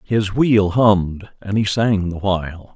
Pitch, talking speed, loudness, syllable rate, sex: 100 Hz, 175 wpm, -18 LUFS, 3.9 syllables/s, male